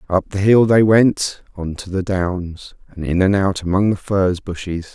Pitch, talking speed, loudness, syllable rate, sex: 95 Hz, 205 wpm, -17 LUFS, 4.5 syllables/s, male